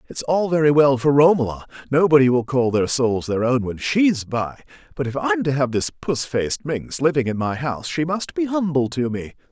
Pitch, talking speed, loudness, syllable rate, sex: 140 Hz, 215 wpm, -20 LUFS, 5.2 syllables/s, male